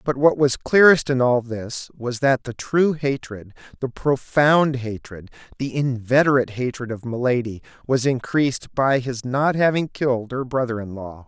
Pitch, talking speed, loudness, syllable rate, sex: 130 Hz, 165 wpm, -21 LUFS, 4.6 syllables/s, male